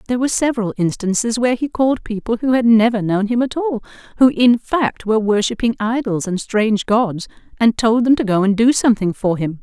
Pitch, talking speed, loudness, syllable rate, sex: 225 Hz, 210 wpm, -17 LUFS, 5.8 syllables/s, female